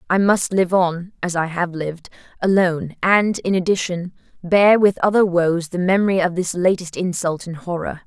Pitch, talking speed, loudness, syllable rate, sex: 180 Hz, 165 wpm, -19 LUFS, 4.9 syllables/s, female